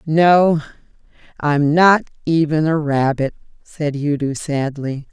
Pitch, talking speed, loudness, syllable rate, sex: 150 Hz, 105 wpm, -17 LUFS, 3.6 syllables/s, female